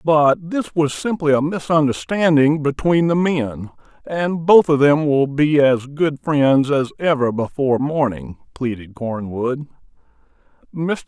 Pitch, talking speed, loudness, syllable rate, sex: 145 Hz, 135 wpm, -18 LUFS, 4.0 syllables/s, male